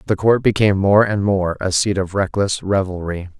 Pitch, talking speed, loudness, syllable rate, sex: 95 Hz, 195 wpm, -17 LUFS, 5.1 syllables/s, male